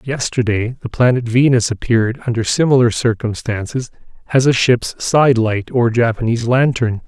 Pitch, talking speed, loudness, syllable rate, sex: 120 Hz, 135 wpm, -16 LUFS, 5.0 syllables/s, male